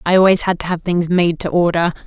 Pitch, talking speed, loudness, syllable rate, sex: 175 Hz, 260 wpm, -16 LUFS, 5.9 syllables/s, female